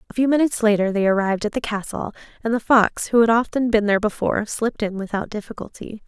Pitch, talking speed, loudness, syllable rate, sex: 220 Hz, 215 wpm, -20 LUFS, 6.6 syllables/s, female